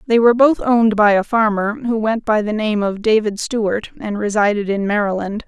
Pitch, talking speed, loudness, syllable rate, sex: 215 Hz, 210 wpm, -17 LUFS, 5.4 syllables/s, female